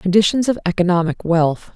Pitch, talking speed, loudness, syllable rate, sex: 185 Hz, 135 wpm, -17 LUFS, 5.5 syllables/s, female